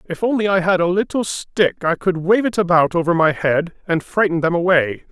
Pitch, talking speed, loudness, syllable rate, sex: 180 Hz, 225 wpm, -17 LUFS, 5.2 syllables/s, male